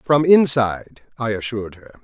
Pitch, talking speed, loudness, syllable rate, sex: 120 Hz, 145 wpm, -18 LUFS, 5.0 syllables/s, male